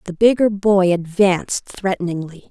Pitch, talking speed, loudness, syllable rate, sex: 190 Hz, 120 wpm, -18 LUFS, 4.7 syllables/s, female